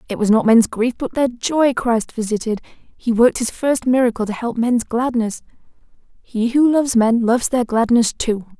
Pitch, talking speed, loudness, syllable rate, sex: 235 Hz, 190 wpm, -17 LUFS, 4.9 syllables/s, female